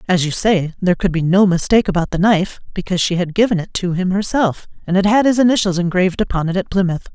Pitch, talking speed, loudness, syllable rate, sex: 185 Hz, 245 wpm, -16 LUFS, 6.8 syllables/s, female